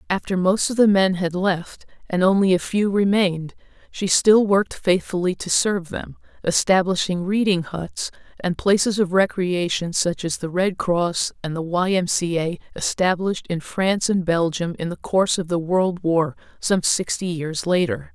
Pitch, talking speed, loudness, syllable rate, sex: 180 Hz, 175 wpm, -21 LUFS, 4.7 syllables/s, female